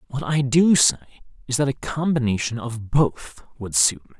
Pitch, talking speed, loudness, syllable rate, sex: 125 Hz, 185 wpm, -21 LUFS, 4.8 syllables/s, male